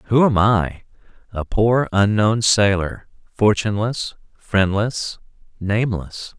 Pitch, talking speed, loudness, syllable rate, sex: 105 Hz, 95 wpm, -19 LUFS, 3.7 syllables/s, male